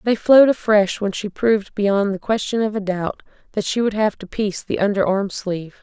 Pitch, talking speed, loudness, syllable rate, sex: 205 Hz, 225 wpm, -19 LUFS, 5.4 syllables/s, female